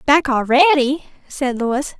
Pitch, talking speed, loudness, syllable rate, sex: 275 Hz, 120 wpm, -17 LUFS, 3.7 syllables/s, female